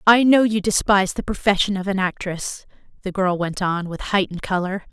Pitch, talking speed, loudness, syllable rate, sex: 195 Hz, 195 wpm, -20 LUFS, 5.5 syllables/s, female